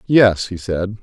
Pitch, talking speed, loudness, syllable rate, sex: 100 Hz, 175 wpm, -17 LUFS, 3.3 syllables/s, male